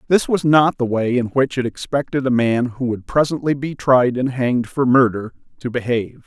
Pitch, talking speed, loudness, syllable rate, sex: 130 Hz, 210 wpm, -18 LUFS, 5.2 syllables/s, male